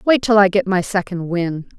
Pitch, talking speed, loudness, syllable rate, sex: 190 Hz, 235 wpm, -17 LUFS, 4.8 syllables/s, female